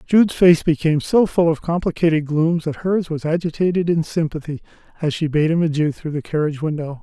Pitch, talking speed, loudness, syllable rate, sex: 160 Hz, 195 wpm, -19 LUFS, 5.9 syllables/s, male